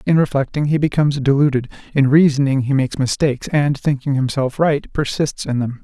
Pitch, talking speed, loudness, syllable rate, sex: 140 Hz, 175 wpm, -17 LUFS, 5.7 syllables/s, male